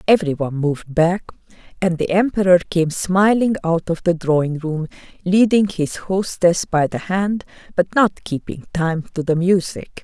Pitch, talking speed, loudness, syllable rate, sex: 175 Hz, 155 wpm, -19 LUFS, 4.5 syllables/s, female